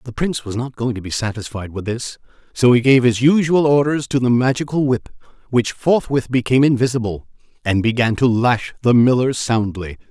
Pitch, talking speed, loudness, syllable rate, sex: 125 Hz, 185 wpm, -17 LUFS, 5.4 syllables/s, male